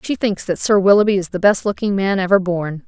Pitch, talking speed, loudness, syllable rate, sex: 195 Hz, 250 wpm, -16 LUFS, 5.8 syllables/s, female